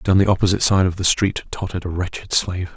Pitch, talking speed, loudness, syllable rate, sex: 95 Hz, 240 wpm, -19 LUFS, 6.8 syllables/s, male